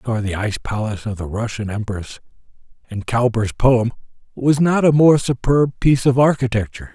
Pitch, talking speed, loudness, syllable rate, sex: 120 Hz, 180 wpm, -18 LUFS, 5.8 syllables/s, male